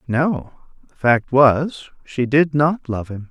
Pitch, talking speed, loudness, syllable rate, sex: 135 Hz, 165 wpm, -18 LUFS, 3.4 syllables/s, male